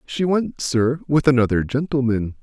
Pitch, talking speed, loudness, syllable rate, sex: 130 Hz, 150 wpm, -20 LUFS, 4.6 syllables/s, male